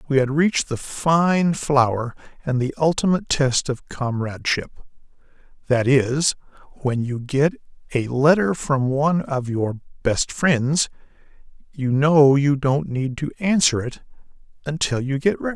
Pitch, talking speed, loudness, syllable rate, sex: 140 Hz, 145 wpm, -20 LUFS, 4.4 syllables/s, male